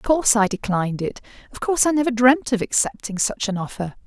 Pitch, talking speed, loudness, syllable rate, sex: 230 Hz, 220 wpm, -20 LUFS, 6.3 syllables/s, female